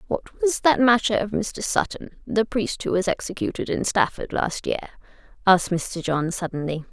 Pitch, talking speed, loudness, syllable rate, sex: 200 Hz, 175 wpm, -23 LUFS, 4.9 syllables/s, female